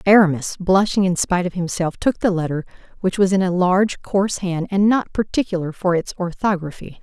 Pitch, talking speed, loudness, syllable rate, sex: 185 Hz, 190 wpm, -19 LUFS, 5.6 syllables/s, female